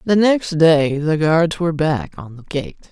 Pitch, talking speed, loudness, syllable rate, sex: 160 Hz, 205 wpm, -17 LUFS, 4.1 syllables/s, female